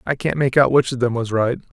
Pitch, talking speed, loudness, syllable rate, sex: 125 Hz, 300 wpm, -18 LUFS, 5.8 syllables/s, male